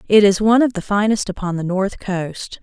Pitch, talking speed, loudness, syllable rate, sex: 200 Hz, 230 wpm, -18 LUFS, 5.3 syllables/s, female